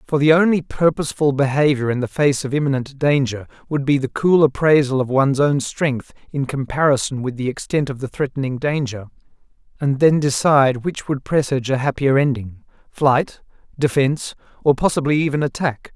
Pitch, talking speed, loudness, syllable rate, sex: 140 Hz, 165 wpm, -19 LUFS, 5.4 syllables/s, male